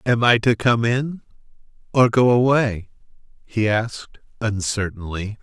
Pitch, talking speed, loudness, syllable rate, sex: 115 Hz, 120 wpm, -20 LUFS, 4.2 syllables/s, male